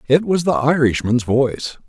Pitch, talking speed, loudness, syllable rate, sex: 135 Hz, 160 wpm, -17 LUFS, 4.9 syllables/s, male